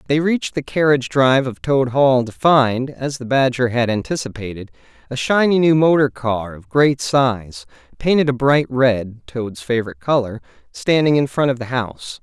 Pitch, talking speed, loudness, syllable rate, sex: 130 Hz, 175 wpm, -18 LUFS, 4.6 syllables/s, male